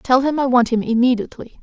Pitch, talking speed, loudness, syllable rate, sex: 245 Hz, 220 wpm, -17 LUFS, 6.3 syllables/s, female